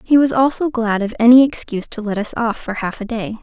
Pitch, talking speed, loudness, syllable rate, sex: 230 Hz, 265 wpm, -17 LUFS, 5.9 syllables/s, female